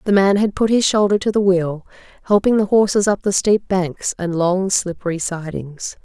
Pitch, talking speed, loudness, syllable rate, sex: 190 Hz, 200 wpm, -17 LUFS, 4.8 syllables/s, female